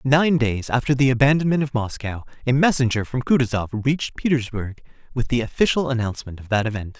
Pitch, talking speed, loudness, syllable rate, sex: 125 Hz, 170 wpm, -21 LUFS, 6.1 syllables/s, male